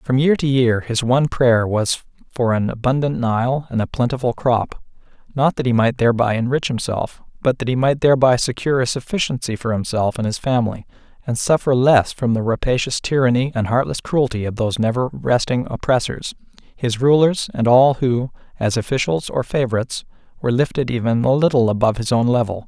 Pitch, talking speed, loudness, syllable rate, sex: 125 Hz, 185 wpm, -18 LUFS, 5.7 syllables/s, male